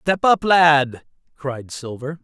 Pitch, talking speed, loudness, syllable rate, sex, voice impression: 145 Hz, 135 wpm, -18 LUFS, 3.2 syllables/s, male, very masculine, slightly old, very thick, tensed, powerful, bright, hard, clear, fluent, cool, very intellectual, refreshing, sincere, very calm, very mature, very friendly, very reassuring, unique, elegant, wild, slightly sweet, lively, kind, slightly intense